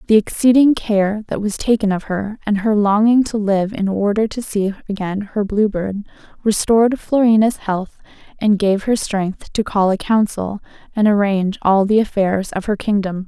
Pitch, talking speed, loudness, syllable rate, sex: 205 Hz, 180 wpm, -17 LUFS, 4.7 syllables/s, female